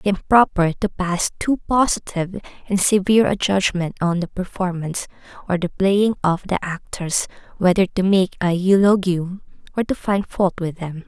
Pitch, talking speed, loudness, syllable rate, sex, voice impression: 185 Hz, 170 wpm, -20 LUFS, 5.1 syllables/s, female, feminine, young, slightly tensed, slightly powerful, soft, slightly halting, cute, calm, friendly, slightly lively, kind, modest